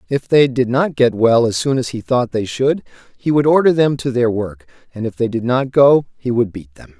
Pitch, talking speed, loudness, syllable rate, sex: 125 Hz, 255 wpm, -16 LUFS, 5.1 syllables/s, male